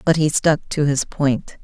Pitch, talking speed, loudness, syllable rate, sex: 145 Hz, 220 wpm, -19 LUFS, 4.0 syllables/s, female